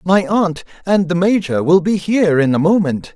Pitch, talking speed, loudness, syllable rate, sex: 180 Hz, 210 wpm, -15 LUFS, 4.9 syllables/s, male